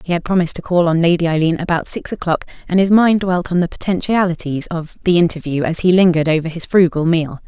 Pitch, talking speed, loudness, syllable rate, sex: 170 Hz, 225 wpm, -16 LUFS, 6.3 syllables/s, female